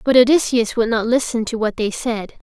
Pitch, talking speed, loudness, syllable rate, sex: 230 Hz, 210 wpm, -18 LUFS, 5.2 syllables/s, female